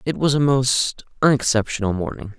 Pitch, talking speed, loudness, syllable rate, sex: 125 Hz, 150 wpm, -20 LUFS, 5.2 syllables/s, male